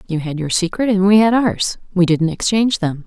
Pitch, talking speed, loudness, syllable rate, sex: 190 Hz, 235 wpm, -16 LUFS, 5.5 syllables/s, female